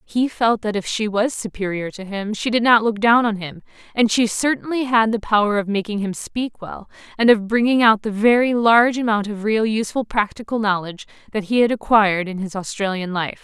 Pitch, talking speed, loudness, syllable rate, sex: 215 Hz, 215 wpm, -19 LUFS, 5.5 syllables/s, female